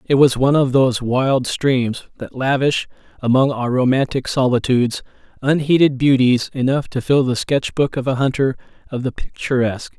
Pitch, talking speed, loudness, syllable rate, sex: 130 Hz, 160 wpm, -17 LUFS, 5.1 syllables/s, male